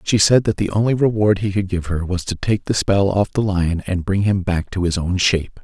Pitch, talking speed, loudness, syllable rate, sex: 95 Hz, 290 wpm, -18 LUFS, 5.6 syllables/s, male